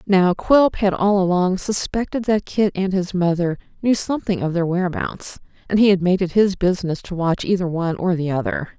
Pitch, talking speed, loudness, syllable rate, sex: 185 Hz, 205 wpm, -19 LUFS, 5.3 syllables/s, female